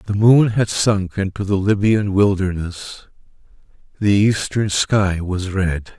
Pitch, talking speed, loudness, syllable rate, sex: 100 Hz, 130 wpm, -18 LUFS, 3.7 syllables/s, male